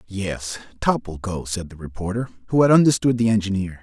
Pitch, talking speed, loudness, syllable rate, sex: 105 Hz, 190 wpm, -21 LUFS, 5.5 syllables/s, male